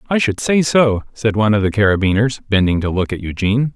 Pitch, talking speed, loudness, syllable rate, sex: 110 Hz, 225 wpm, -16 LUFS, 6.0 syllables/s, male